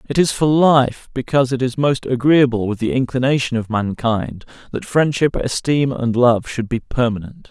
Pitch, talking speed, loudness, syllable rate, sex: 125 Hz, 175 wpm, -17 LUFS, 4.8 syllables/s, male